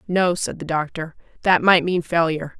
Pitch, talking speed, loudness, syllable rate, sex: 170 Hz, 185 wpm, -20 LUFS, 5.1 syllables/s, female